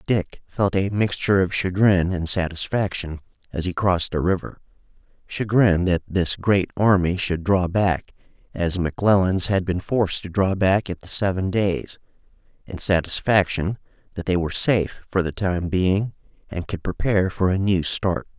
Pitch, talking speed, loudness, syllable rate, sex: 95 Hz, 165 wpm, -22 LUFS, 4.7 syllables/s, male